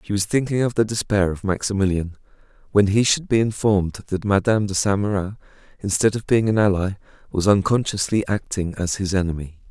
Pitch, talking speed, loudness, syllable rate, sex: 100 Hz, 180 wpm, -21 LUFS, 5.7 syllables/s, male